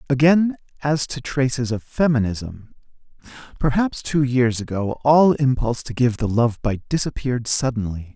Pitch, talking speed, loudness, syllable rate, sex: 125 Hz, 140 wpm, -20 LUFS, 4.7 syllables/s, male